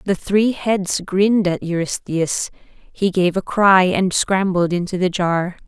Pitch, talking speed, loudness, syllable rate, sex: 185 Hz, 160 wpm, -18 LUFS, 3.8 syllables/s, female